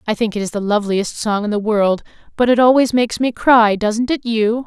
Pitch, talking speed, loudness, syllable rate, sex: 220 Hz, 245 wpm, -16 LUFS, 5.5 syllables/s, female